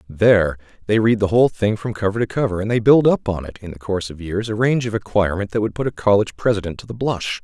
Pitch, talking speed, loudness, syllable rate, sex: 105 Hz, 275 wpm, -19 LUFS, 6.8 syllables/s, male